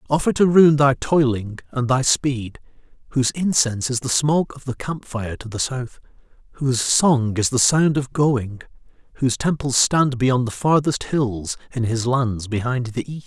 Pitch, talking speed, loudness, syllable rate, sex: 130 Hz, 180 wpm, -20 LUFS, 4.6 syllables/s, male